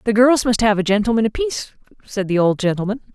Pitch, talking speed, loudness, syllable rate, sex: 220 Hz, 210 wpm, -18 LUFS, 6.4 syllables/s, female